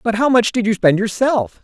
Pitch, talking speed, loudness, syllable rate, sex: 220 Hz, 255 wpm, -16 LUFS, 5.2 syllables/s, male